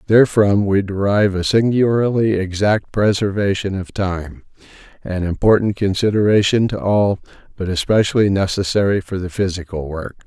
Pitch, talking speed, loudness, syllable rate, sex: 100 Hz, 115 wpm, -17 LUFS, 5.1 syllables/s, male